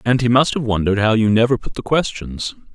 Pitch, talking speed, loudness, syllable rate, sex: 115 Hz, 240 wpm, -18 LUFS, 6.0 syllables/s, male